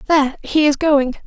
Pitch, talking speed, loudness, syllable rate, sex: 285 Hz, 190 wpm, -16 LUFS, 5.5 syllables/s, female